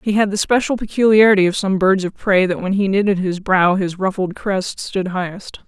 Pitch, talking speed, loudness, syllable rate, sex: 195 Hz, 220 wpm, -17 LUFS, 5.2 syllables/s, female